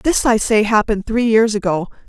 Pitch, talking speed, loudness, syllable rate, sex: 215 Hz, 200 wpm, -16 LUFS, 5.4 syllables/s, female